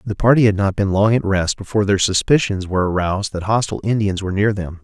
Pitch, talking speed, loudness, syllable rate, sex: 100 Hz, 235 wpm, -18 LUFS, 6.6 syllables/s, male